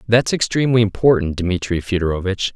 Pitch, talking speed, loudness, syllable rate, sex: 105 Hz, 115 wpm, -18 LUFS, 5.9 syllables/s, male